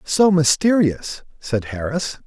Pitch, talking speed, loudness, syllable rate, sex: 155 Hz, 105 wpm, -18 LUFS, 3.5 syllables/s, male